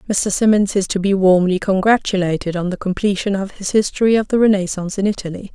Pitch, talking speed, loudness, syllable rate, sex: 195 Hz, 195 wpm, -17 LUFS, 6.2 syllables/s, female